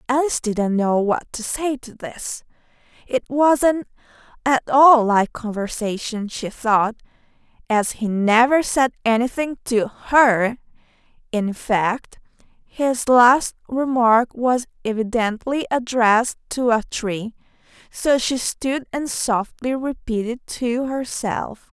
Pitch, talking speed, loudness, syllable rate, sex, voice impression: 240 Hz, 115 wpm, -20 LUFS, 3.5 syllables/s, female, feminine, adult-like, tensed, slightly powerful, bright, halting, friendly, unique, intense